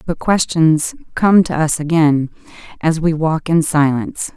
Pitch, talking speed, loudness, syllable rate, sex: 160 Hz, 150 wpm, -15 LUFS, 4.2 syllables/s, female